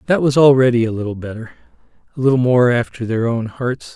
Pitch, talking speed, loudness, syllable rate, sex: 120 Hz, 195 wpm, -16 LUFS, 6.1 syllables/s, male